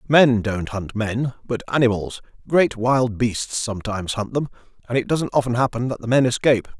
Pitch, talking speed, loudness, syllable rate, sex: 120 Hz, 185 wpm, -21 LUFS, 5.2 syllables/s, male